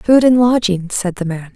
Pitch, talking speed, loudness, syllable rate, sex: 205 Hz, 230 wpm, -15 LUFS, 4.7 syllables/s, female